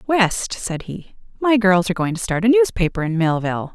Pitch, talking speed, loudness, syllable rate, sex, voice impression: 200 Hz, 210 wpm, -19 LUFS, 5.3 syllables/s, female, feminine, adult-like, tensed, powerful, slightly soft, clear, intellectual, calm, friendly, reassuring, elegant, kind